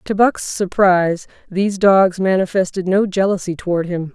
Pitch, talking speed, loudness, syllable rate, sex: 190 Hz, 145 wpm, -17 LUFS, 4.9 syllables/s, female